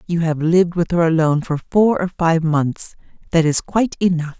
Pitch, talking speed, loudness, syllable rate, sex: 170 Hz, 205 wpm, -17 LUFS, 5.2 syllables/s, female